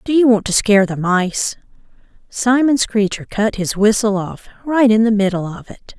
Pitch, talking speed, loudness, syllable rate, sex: 215 Hz, 190 wpm, -16 LUFS, 4.8 syllables/s, female